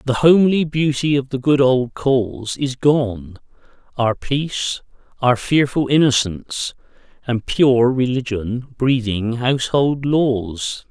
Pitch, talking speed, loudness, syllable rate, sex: 130 Hz, 115 wpm, -18 LUFS, 3.8 syllables/s, male